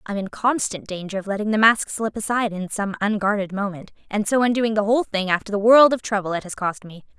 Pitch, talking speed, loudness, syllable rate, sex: 210 Hz, 240 wpm, -21 LUFS, 6.1 syllables/s, female